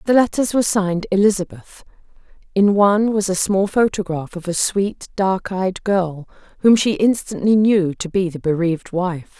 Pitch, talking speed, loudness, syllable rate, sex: 190 Hz, 165 wpm, -18 LUFS, 4.8 syllables/s, female